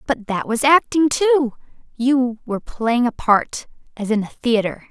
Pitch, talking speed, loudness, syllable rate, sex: 245 Hz, 145 wpm, -19 LUFS, 4.2 syllables/s, female